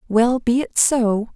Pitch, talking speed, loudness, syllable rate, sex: 235 Hz, 175 wpm, -18 LUFS, 3.5 syllables/s, female